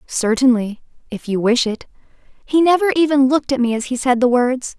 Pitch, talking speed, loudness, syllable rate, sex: 255 Hz, 200 wpm, -16 LUFS, 5.5 syllables/s, female